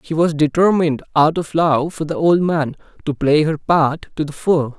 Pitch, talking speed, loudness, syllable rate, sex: 155 Hz, 215 wpm, -17 LUFS, 4.7 syllables/s, male